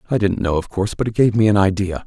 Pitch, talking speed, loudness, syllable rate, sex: 100 Hz, 320 wpm, -18 LUFS, 7.0 syllables/s, male